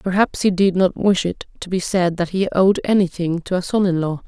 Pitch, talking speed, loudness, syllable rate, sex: 185 Hz, 255 wpm, -19 LUFS, 5.2 syllables/s, female